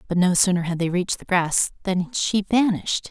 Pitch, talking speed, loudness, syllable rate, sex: 185 Hz, 215 wpm, -21 LUFS, 5.3 syllables/s, female